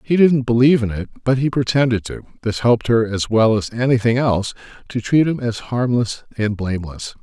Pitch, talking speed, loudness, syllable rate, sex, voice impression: 120 Hz, 200 wpm, -18 LUFS, 5.6 syllables/s, male, masculine, slightly middle-aged, thick, cool, sincere, calm, slightly mature, slightly elegant